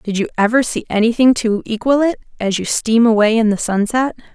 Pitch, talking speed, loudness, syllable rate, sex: 225 Hz, 205 wpm, -16 LUFS, 5.5 syllables/s, female